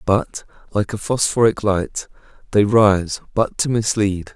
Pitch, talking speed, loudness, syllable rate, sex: 105 Hz, 140 wpm, -18 LUFS, 3.9 syllables/s, male